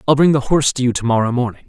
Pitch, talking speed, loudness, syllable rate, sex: 125 Hz, 320 wpm, -16 LUFS, 8.0 syllables/s, male